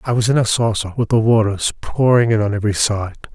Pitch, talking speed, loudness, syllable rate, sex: 110 Hz, 235 wpm, -17 LUFS, 6.0 syllables/s, male